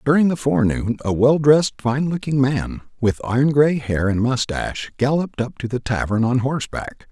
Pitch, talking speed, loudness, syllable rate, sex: 130 Hz, 185 wpm, -19 LUFS, 5.3 syllables/s, male